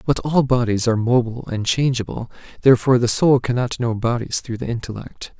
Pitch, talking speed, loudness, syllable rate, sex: 120 Hz, 180 wpm, -19 LUFS, 6.0 syllables/s, male